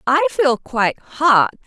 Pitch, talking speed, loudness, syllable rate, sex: 280 Hz, 145 wpm, -17 LUFS, 3.6 syllables/s, female